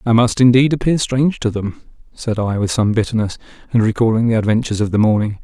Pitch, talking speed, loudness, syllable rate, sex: 115 Hz, 210 wpm, -16 LUFS, 6.4 syllables/s, male